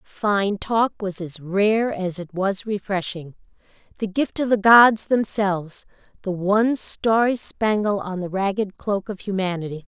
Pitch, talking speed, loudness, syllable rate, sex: 200 Hz, 145 wpm, -21 LUFS, 4.1 syllables/s, female